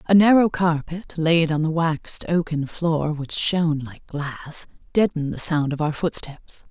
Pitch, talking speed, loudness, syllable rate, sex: 160 Hz, 170 wpm, -21 LUFS, 4.3 syllables/s, female